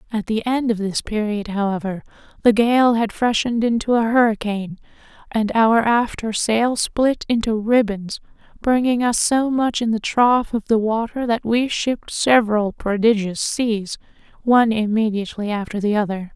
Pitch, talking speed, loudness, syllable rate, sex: 225 Hz, 150 wpm, -19 LUFS, 4.8 syllables/s, female